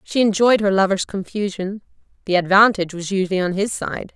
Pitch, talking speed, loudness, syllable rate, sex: 195 Hz, 175 wpm, -19 LUFS, 5.8 syllables/s, female